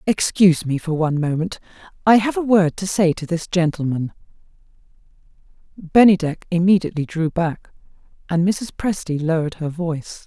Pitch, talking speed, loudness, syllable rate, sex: 175 Hz, 140 wpm, -19 LUFS, 5.5 syllables/s, female